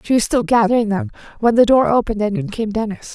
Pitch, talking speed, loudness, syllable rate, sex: 220 Hz, 250 wpm, -17 LUFS, 6.6 syllables/s, female